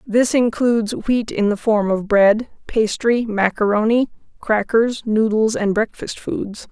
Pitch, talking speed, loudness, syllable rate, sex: 220 Hz, 135 wpm, -18 LUFS, 4.0 syllables/s, female